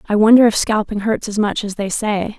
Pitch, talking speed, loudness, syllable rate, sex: 210 Hz, 250 wpm, -16 LUFS, 5.5 syllables/s, female